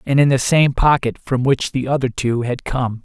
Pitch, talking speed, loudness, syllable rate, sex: 130 Hz, 235 wpm, -17 LUFS, 4.8 syllables/s, male